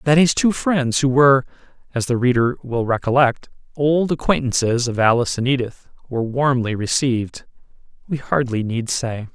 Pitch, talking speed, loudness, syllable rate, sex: 130 Hz, 155 wpm, -19 LUFS, 5.1 syllables/s, male